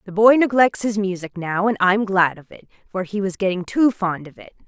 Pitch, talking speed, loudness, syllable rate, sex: 200 Hz, 245 wpm, -19 LUFS, 5.2 syllables/s, female